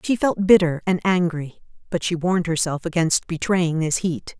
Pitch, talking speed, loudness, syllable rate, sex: 170 Hz, 175 wpm, -21 LUFS, 4.9 syllables/s, female